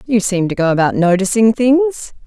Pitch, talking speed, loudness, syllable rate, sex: 220 Hz, 185 wpm, -14 LUFS, 4.9 syllables/s, female